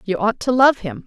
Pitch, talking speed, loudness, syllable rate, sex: 225 Hz, 280 wpm, -17 LUFS, 5.2 syllables/s, female